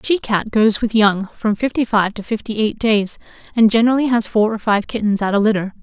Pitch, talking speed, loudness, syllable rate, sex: 220 Hz, 235 wpm, -17 LUFS, 5.6 syllables/s, female